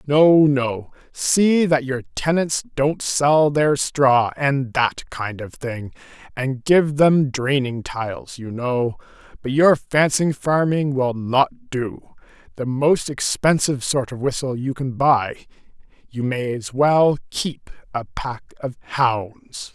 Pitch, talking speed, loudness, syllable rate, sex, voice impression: 135 Hz, 135 wpm, -20 LUFS, 3.4 syllables/s, male, masculine, very adult-like, slightly old, thick, slightly relaxed, powerful, slightly dark, very hard, slightly muffled, fluent, raspy, cool, very intellectual, sincere, calm, very mature, friendly, reassuring, very unique, very wild, slightly sweet, slightly lively, strict, intense